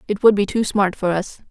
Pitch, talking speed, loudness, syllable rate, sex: 200 Hz, 280 wpm, -19 LUFS, 5.7 syllables/s, female